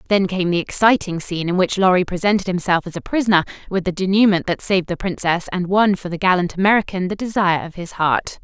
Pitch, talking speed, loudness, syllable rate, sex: 185 Hz, 220 wpm, -18 LUFS, 6.4 syllables/s, female